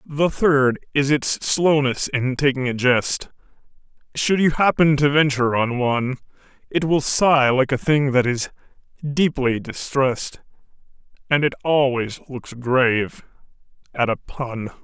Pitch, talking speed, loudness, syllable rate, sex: 135 Hz, 140 wpm, -20 LUFS, 4.2 syllables/s, male